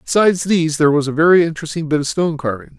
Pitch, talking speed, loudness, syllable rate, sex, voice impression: 160 Hz, 235 wpm, -16 LUFS, 7.8 syllables/s, male, masculine, adult-like, slightly refreshing, sincere, slightly friendly